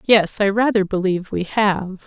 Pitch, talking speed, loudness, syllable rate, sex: 200 Hz, 175 wpm, -19 LUFS, 4.6 syllables/s, female